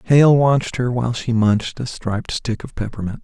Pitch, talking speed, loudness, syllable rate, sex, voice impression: 120 Hz, 205 wpm, -19 LUFS, 5.4 syllables/s, male, masculine, adult-like, slightly weak, refreshing, calm, slightly modest